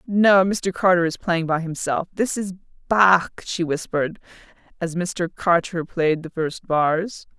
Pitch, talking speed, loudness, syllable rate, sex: 175 Hz, 145 wpm, -21 LUFS, 3.9 syllables/s, female